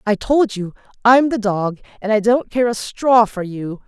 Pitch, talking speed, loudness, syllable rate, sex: 220 Hz, 215 wpm, -17 LUFS, 4.4 syllables/s, female